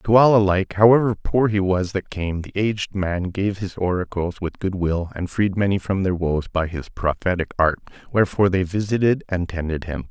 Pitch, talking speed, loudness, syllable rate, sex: 95 Hz, 200 wpm, -21 LUFS, 5.4 syllables/s, male